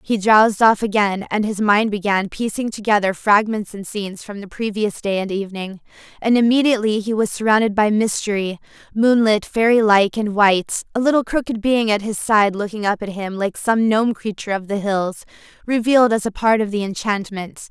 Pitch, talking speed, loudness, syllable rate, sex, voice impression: 210 Hz, 185 wpm, -18 LUFS, 5.5 syllables/s, female, feminine, adult-like, tensed, refreshing, elegant, slightly lively